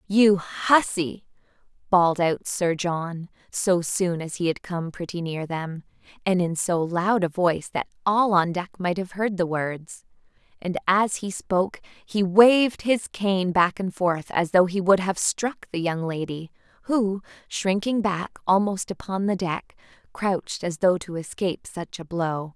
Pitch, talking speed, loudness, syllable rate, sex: 185 Hz, 175 wpm, -24 LUFS, 4.1 syllables/s, female